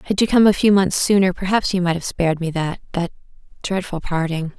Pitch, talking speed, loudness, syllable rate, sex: 180 Hz, 210 wpm, -19 LUFS, 5.9 syllables/s, female